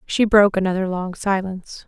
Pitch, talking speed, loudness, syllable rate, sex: 190 Hz, 160 wpm, -19 LUFS, 5.7 syllables/s, female